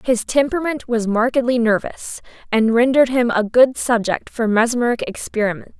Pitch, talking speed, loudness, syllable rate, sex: 235 Hz, 145 wpm, -18 LUFS, 5.2 syllables/s, female